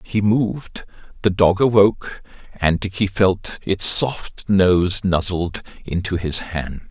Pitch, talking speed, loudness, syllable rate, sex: 95 Hz, 130 wpm, -19 LUFS, 3.6 syllables/s, male